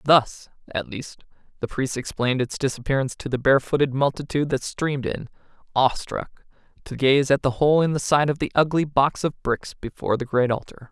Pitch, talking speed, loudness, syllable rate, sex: 135 Hz, 185 wpm, -23 LUFS, 5.7 syllables/s, male